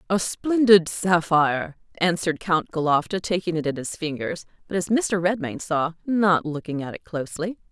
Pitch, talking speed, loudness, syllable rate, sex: 175 Hz, 165 wpm, -23 LUFS, 5.0 syllables/s, female